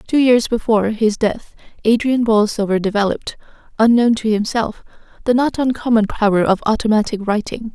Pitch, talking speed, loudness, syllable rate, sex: 225 Hz, 140 wpm, -17 LUFS, 5.5 syllables/s, female